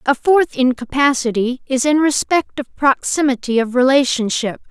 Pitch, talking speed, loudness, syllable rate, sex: 265 Hz, 125 wpm, -16 LUFS, 4.7 syllables/s, female